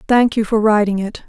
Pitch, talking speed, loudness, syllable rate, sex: 215 Hz, 235 wpm, -16 LUFS, 5.5 syllables/s, female